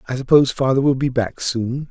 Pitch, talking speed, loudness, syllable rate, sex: 130 Hz, 220 wpm, -18 LUFS, 5.5 syllables/s, male